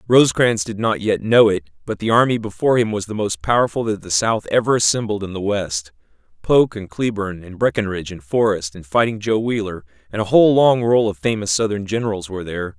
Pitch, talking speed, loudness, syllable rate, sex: 105 Hz, 210 wpm, -18 LUFS, 6.0 syllables/s, male